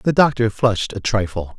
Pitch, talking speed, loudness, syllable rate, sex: 110 Hz, 190 wpm, -19 LUFS, 5.5 syllables/s, male